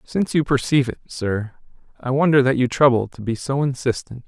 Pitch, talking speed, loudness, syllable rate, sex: 130 Hz, 195 wpm, -20 LUFS, 5.8 syllables/s, male